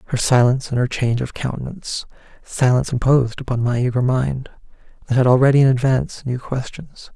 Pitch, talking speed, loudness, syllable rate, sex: 125 Hz, 170 wpm, -18 LUFS, 6.2 syllables/s, male